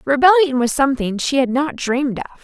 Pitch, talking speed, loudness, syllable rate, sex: 270 Hz, 195 wpm, -17 LUFS, 6.0 syllables/s, female